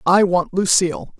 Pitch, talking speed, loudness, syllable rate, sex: 180 Hz, 150 wpm, -17 LUFS, 4.8 syllables/s, female